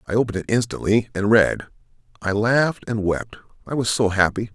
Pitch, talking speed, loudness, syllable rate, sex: 105 Hz, 185 wpm, -21 LUFS, 5.8 syllables/s, male